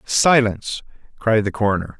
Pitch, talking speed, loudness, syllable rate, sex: 110 Hz, 120 wpm, -19 LUFS, 5.1 syllables/s, male